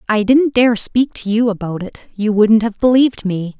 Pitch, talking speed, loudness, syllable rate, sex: 220 Hz, 215 wpm, -15 LUFS, 4.8 syllables/s, female